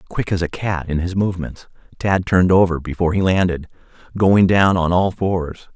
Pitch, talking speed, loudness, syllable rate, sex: 90 Hz, 190 wpm, -18 LUFS, 5.3 syllables/s, male